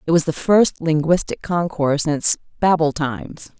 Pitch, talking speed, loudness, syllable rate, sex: 160 Hz, 150 wpm, -18 LUFS, 5.1 syllables/s, female